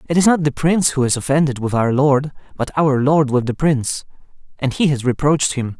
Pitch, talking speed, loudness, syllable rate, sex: 140 Hz, 230 wpm, -17 LUFS, 5.8 syllables/s, male